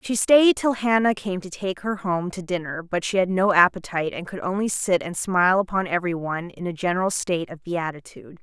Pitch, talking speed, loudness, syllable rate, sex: 185 Hz, 215 wpm, -23 LUFS, 5.7 syllables/s, female